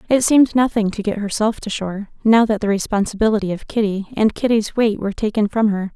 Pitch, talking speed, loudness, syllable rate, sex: 215 Hz, 210 wpm, -18 LUFS, 6.1 syllables/s, female